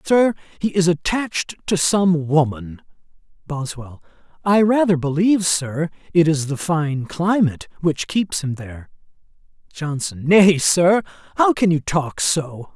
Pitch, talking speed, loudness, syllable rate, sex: 165 Hz, 135 wpm, -19 LUFS, 4.2 syllables/s, male